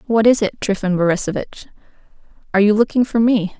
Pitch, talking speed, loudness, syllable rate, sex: 210 Hz, 165 wpm, -17 LUFS, 6.5 syllables/s, female